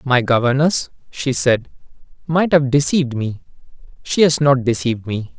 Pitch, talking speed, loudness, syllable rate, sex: 135 Hz, 135 wpm, -17 LUFS, 4.9 syllables/s, male